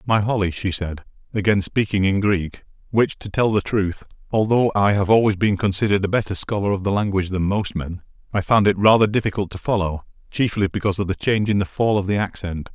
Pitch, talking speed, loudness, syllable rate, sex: 100 Hz, 215 wpm, -20 LUFS, 6.0 syllables/s, male